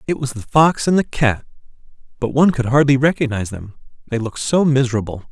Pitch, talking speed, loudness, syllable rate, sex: 130 Hz, 190 wpm, -17 LUFS, 6.5 syllables/s, male